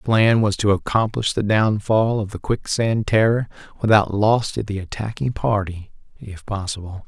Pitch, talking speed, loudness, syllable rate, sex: 105 Hz, 160 wpm, -20 LUFS, 4.7 syllables/s, male